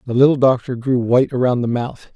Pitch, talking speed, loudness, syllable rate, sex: 125 Hz, 225 wpm, -17 LUFS, 6.0 syllables/s, male